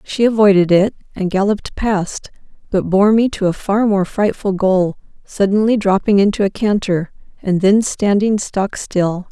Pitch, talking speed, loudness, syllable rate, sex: 200 Hz, 160 wpm, -16 LUFS, 4.5 syllables/s, female